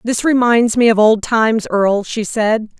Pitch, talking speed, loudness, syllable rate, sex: 225 Hz, 195 wpm, -14 LUFS, 4.6 syllables/s, female